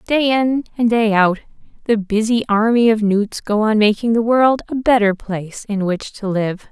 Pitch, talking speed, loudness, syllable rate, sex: 220 Hz, 195 wpm, -17 LUFS, 4.6 syllables/s, female